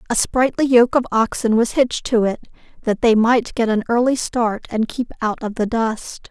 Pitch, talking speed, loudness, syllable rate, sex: 230 Hz, 210 wpm, -18 LUFS, 4.8 syllables/s, female